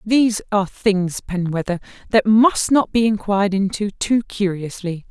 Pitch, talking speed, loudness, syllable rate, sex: 200 Hz, 140 wpm, -19 LUFS, 4.6 syllables/s, female